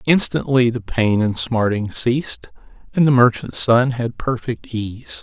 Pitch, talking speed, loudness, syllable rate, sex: 120 Hz, 150 wpm, -18 LUFS, 4.1 syllables/s, male